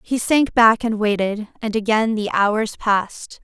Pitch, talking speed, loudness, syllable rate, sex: 220 Hz, 175 wpm, -18 LUFS, 4.1 syllables/s, female